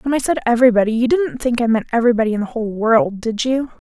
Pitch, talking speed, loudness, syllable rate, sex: 240 Hz, 250 wpm, -17 LUFS, 7.1 syllables/s, female